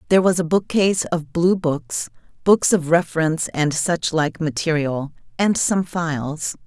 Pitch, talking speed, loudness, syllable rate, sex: 160 Hz, 135 wpm, -20 LUFS, 4.8 syllables/s, female